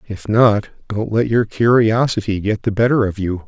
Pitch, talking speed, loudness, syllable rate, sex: 110 Hz, 190 wpm, -17 LUFS, 4.7 syllables/s, male